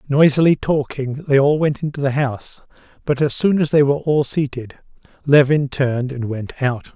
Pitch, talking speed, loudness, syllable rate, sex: 140 Hz, 180 wpm, -18 LUFS, 5.1 syllables/s, male